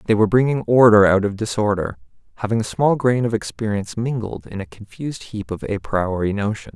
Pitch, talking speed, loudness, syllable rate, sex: 105 Hz, 195 wpm, -19 LUFS, 5.8 syllables/s, male